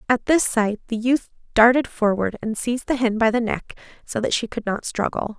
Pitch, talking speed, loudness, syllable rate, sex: 230 Hz, 225 wpm, -21 LUFS, 5.2 syllables/s, female